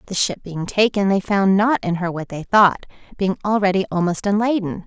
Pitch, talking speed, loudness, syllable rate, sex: 195 Hz, 195 wpm, -19 LUFS, 5.3 syllables/s, female